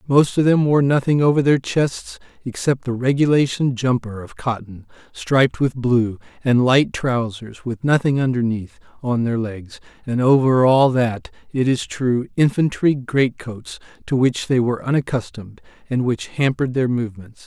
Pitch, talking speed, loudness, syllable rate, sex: 125 Hz, 160 wpm, -19 LUFS, 4.7 syllables/s, male